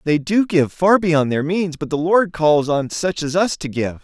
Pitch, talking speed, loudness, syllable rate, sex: 160 Hz, 255 wpm, -18 LUFS, 4.4 syllables/s, male